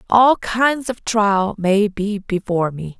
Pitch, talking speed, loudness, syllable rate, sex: 205 Hz, 160 wpm, -18 LUFS, 3.6 syllables/s, female